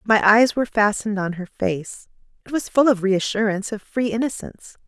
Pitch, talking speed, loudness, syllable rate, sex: 215 Hz, 185 wpm, -20 LUFS, 5.6 syllables/s, female